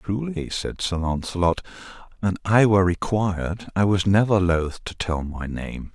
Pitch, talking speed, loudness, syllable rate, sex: 95 Hz, 160 wpm, -23 LUFS, 4.5 syllables/s, male